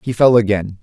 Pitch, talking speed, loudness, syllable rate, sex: 110 Hz, 220 wpm, -14 LUFS, 5.6 syllables/s, male